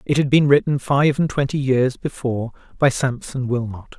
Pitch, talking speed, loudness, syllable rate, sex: 135 Hz, 180 wpm, -19 LUFS, 5.2 syllables/s, male